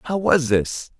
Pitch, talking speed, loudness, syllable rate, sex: 135 Hz, 180 wpm, -20 LUFS, 3.9 syllables/s, male